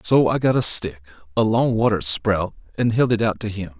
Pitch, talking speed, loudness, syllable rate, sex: 105 Hz, 205 wpm, -19 LUFS, 5.1 syllables/s, male